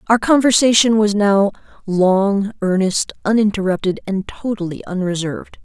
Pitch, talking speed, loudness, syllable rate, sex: 200 Hz, 105 wpm, -17 LUFS, 4.7 syllables/s, female